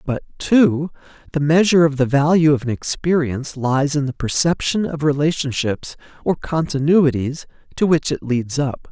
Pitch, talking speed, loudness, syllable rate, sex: 150 Hz, 155 wpm, -18 LUFS, 5.1 syllables/s, male